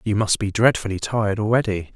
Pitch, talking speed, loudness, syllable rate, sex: 105 Hz, 185 wpm, -20 LUFS, 6.0 syllables/s, male